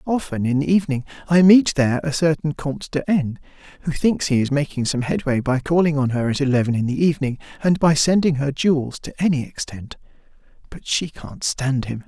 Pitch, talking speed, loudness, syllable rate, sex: 145 Hz, 205 wpm, -20 LUFS, 5.7 syllables/s, male